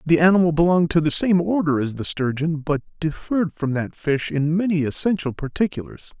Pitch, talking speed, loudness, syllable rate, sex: 160 Hz, 185 wpm, -21 LUFS, 5.6 syllables/s, male